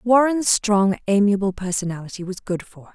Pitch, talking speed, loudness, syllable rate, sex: 200 Hz, 165 wpm, -21 LUFS, 5.4 syllables/s, female